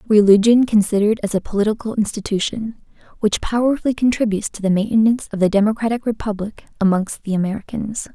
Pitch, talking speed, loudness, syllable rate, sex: 215 Hz, 140 wpm, -18 LUFS, 6.6 syllables/s, female